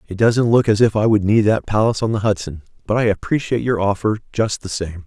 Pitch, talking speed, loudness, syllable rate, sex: 105 Hz, 250 wpm, -18 LUFS, 6.1 syllables/s, male